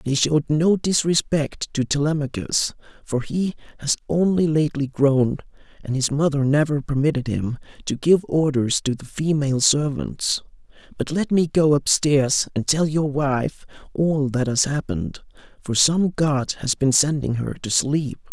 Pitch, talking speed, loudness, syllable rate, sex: 145 Hz, 155 wpm, -21 LUFS, 4.4 syllables/s, male